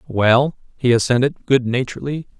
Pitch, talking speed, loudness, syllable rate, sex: 130 Hz, 125 wpm, -18 LUFS, 5.1 syllables/s, male